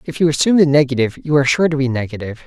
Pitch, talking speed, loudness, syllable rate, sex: 140 Hz, 265 wpm, -16 LUFS, 8.6 syllables/s, male